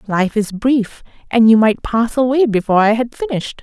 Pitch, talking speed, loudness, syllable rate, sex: 230 Hz, 200 wpm, -15 LUFS, 5.3 syllables/s, female